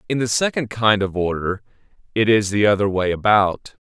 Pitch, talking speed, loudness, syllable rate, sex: 105 Hz, 185 wpm, -19 LUFS, 5.2 syllables/s, male